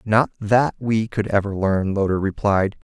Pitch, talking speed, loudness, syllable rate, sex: 105 Hz, 165 wpm, -20 LUFS, 4.3 syllables/s, male